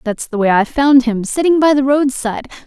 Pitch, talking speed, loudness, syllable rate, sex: 255 Hz, 225 wpm, -14 LUFS, 5.6 syllables/s, female